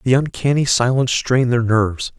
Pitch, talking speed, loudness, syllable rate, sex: 125 Hz, 165 wpm, -17 LUFS, 5.9 syllables/s, male